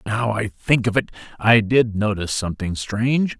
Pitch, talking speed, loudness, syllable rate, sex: 110 Hz, 175 wpm, -20 LUFS, 5.0 syllables/s, male